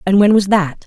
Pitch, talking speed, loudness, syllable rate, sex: 195 Hz, 280 wpm, -13 LUFS, 5.3 syllables/s, female